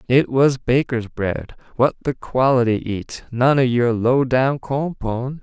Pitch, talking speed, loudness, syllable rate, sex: 125 Hz, 165 wpm, -19 LUFS, 3.7 syllables/s, male